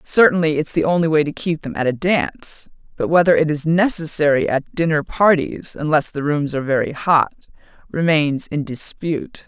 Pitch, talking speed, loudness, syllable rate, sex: 155 Hz, 175 wpm, -18 LUFS, 5.1 syllables/s, female